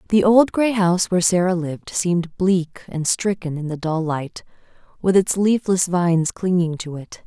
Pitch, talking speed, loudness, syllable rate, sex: 180 Hz, 180 wpm, -20 LUFS, 4.8 syllables/s, female